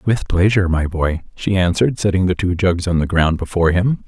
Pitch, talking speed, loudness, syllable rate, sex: 90 Hz, 220 wpm, -17 LUFS, 5.7 syllables/s, male